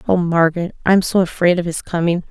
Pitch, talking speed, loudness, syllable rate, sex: 175 Hz, 210 wpm, -17 LUFS, 5.9 syllables/s, female